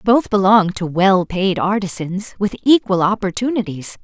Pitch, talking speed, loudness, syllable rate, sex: 195 Hz, 135 wpm, -17 LUFS, 4.6 syllables/s, female